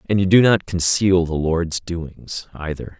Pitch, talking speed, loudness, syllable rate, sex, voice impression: 85 Hz, 180 wpm, -19 LUFS, 3.9 syllables/s, male, very masculine, adult-like, slightly thick, cool, slightly refreshing, sincere, slightly calm